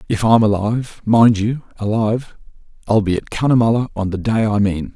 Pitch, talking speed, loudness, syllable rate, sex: 110 Hz, 160 wpm, -17 LUFS, 5.4 syllables/s, male